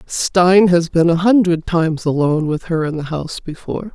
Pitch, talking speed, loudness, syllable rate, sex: 170 Hz, 200 wpm, -16 LUFS, 5.5 syllables/s, female